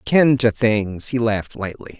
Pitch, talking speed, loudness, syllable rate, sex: 115 Hz, 180 wpm, -19 LUFS, 4.2 syllables/s, male